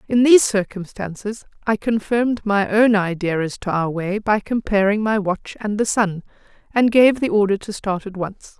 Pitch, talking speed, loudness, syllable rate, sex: 205 Hz, 190 wpm, -19 LUFS, 4.8 syllables/s, female